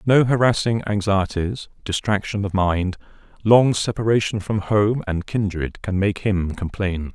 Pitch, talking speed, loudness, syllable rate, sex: 100 Hz, 135 wpm, -21 LUFS, 4.3 syllables/s, male